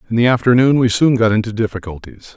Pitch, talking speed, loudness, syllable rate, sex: 115 Hz, 205 wpm, -14 LUFS, 6.6 syllables/s, male